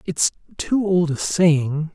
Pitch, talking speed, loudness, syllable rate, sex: 165 Hz, 155 wpm, -20 LUFS, 3.2 syllables/s, male